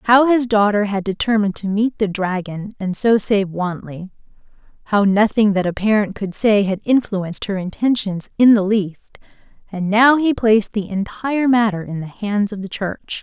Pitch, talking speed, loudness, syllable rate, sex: 205 Hz, 180 wpm, -18 LUFS, 4.8 syllables/s, female